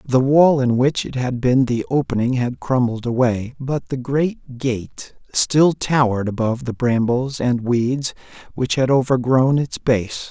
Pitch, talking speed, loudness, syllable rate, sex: 125 Hz, 165 wpm, -19 LUFS, 4.1 syllables/s, male